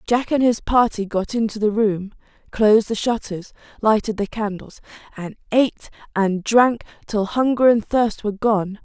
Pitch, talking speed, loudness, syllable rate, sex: 215 Hz, 165 wpm, -19 LUFS, 4.7 syllables/s, female